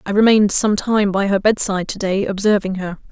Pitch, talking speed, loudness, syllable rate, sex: 200 Hz, 210 wpm, -17 LUFS, 5.8 syllables/s, female